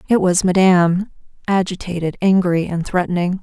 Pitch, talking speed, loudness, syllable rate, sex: 180 Hz, 125 wpm, -17 LUFS, 5.2 syllables/s, female